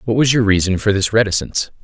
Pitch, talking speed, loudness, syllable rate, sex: 105 Hz, 230 wpm, -16 LUFS, 6.8 syllables/s, male